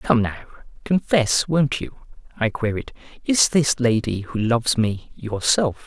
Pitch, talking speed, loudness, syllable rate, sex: 125 Hz, 145 wpm, -21 LUFS, 4.0 syllables/s, male